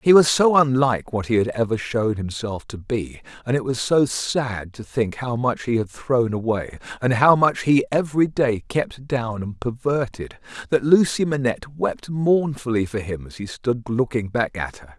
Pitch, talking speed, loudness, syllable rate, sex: 120 Hz, 195 wpm, -21 LUFS, 4.6 syllables/s, male